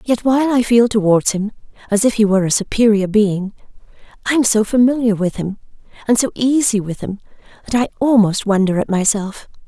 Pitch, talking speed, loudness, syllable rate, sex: 215 Hz, 185 wpm, -16 LUFS, 5.7 syllables/s, female